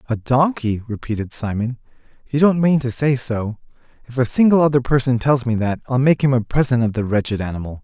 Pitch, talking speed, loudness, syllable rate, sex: 125 Hz, 205 wpm, -19 LUFS, 5.8 syllables/s, male